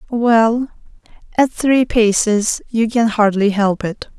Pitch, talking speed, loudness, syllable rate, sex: 225 Hz, 130 wpm, -16 LUFS, 3.5 syllables/s, female